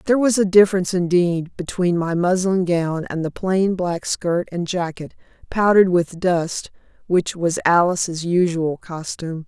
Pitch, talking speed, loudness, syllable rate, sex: 175 Hz, 150 wpm, -19 LUFS, 4.5 syllables/s, female